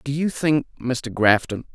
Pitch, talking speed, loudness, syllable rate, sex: 130 Hz, 170 wpm, -21 LUFS, 4.2 syllables/s, male